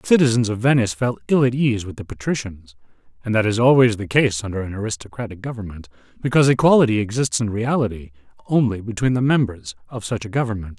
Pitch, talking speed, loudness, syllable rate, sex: 110 Hz, 190 wpm, -19 LUFS, 6.5 syllables/s, male